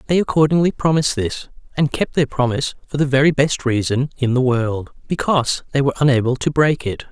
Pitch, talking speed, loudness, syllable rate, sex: 135 Hz, 185 wpm, -18 LUFS, 6.1 syllables/s, male